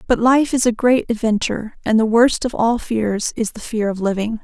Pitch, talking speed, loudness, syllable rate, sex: 225 Hz, 230 wpm, -18 LUFS, 5.1 syllables/s, female